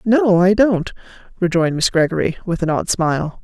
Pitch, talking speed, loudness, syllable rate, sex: 180 Hz, 175 wpm, -17 LUFS, 5.4 syllables/s, female